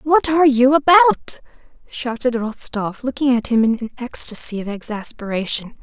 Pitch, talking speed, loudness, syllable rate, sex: 250 Hz, 145 wpm, -18 LUFS, 5.4 syllables/s, female